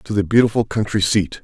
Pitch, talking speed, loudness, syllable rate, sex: 105 Hz, 210 wpm, -17 LUFS, 5.8 syllables/s, male